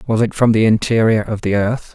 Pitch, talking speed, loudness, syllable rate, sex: 110 Hz, 245 wpm, -16 LUFS, 5.5 syllables/s, male